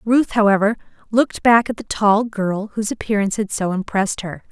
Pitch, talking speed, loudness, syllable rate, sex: 210 Hz, 185 wpm, -19 LUFS, 5.8 syllables/s, female